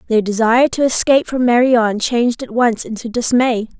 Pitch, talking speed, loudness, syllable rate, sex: 235 Hz, 175 wpm, -15 LUFS, 5.7 syllables/s, female